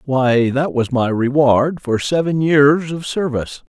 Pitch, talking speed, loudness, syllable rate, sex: 140 Hz, 160 wpm, -16 LUFS, 3.9 syllables/s, male